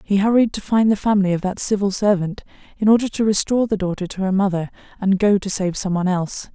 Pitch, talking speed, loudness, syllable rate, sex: 200 Hz, 230 wpm, -19 LUFS, 6.5 syllables/s, female